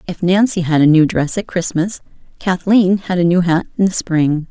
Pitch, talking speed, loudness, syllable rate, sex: 175 Hz, 215 wpm, -15 LUFS, 4.9 syllables/s, female